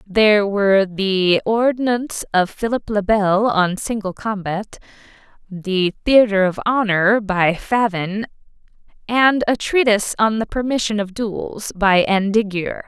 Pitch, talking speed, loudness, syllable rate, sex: 205 Hz, 125 wpm, -18 LUFS, 4.1 syllables/s, female